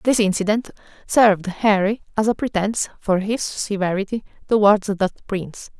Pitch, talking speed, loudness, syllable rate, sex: 205 Hz, 135 wpm, -20 LUFS, 5.2 syllables/s, female